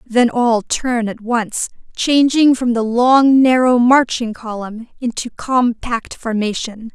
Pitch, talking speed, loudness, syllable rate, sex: 240 Hz, 130 wpm, -16 LUFS, 3.6 syllables/s, female